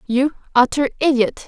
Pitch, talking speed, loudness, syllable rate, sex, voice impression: 265 Hz, 120 wpm, -18 LUFS, 4.8 syllables/s, female, very feminine, adult-like, slightly fluent, slightly calm, slightly sweet